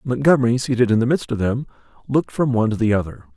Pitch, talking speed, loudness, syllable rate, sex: 120 Hz, 230 wpm, -19 LUFS, 7.3 syllables/s, male